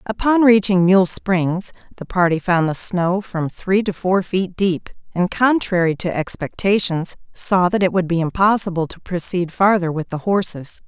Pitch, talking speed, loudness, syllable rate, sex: 185 Hz, 170 wpm, -18 LUFS, 4.5 syllables/s, female